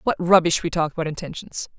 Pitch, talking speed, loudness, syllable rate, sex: 170 Hz, 200 wpm, -21 LUFS, 6.2 syllables/s, female